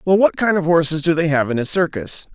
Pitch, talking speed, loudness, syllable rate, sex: 165 Hz, 280 wpm, -17 LUFS, 5.9 syllables/s, male